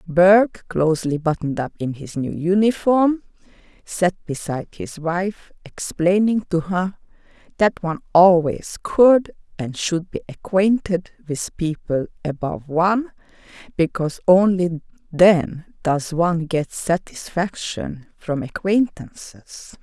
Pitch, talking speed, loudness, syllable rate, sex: 175 Hz, 110 wpm, -20 LUFS, 4.2 syllables/s, female